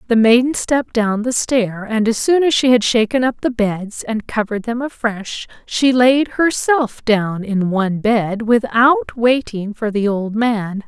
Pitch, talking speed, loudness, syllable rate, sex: 230 Hz, 180 wpm, -16 LUFS, 4.1 syllables/s, female